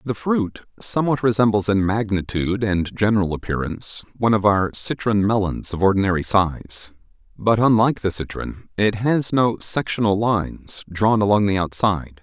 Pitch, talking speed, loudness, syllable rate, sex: 100 Hz, 145 wpm, -20 LUFS, 5.1 syllables/s, male